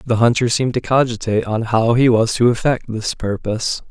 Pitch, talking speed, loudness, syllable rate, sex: 115 Hz, 200 wpm, -17 LUFS, 5.7 syllables/s, male